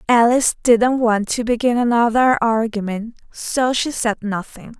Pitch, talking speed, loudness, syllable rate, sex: 230 Hz, 140 wpm, -17 LUFS, 4.3 syllables/s, female